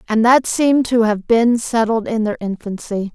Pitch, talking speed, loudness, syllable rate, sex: 225 Hz, 190 wpm, -16 LUFS, 4.7 syllables/s, female